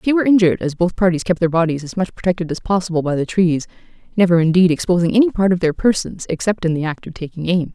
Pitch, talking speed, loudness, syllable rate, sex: 175 Hz, 250 wpm, -17 LUFS, 6.8 syllables/s, female